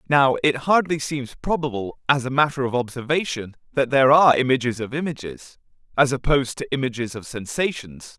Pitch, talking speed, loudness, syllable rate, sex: 135 Hz, 160 wpm, -21 LUFS, 5.7 syllables/s, male